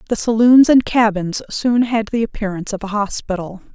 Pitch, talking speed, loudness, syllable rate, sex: 215 Hz, 175 wpm, -16 LUFS, 5.3 syllables/s, female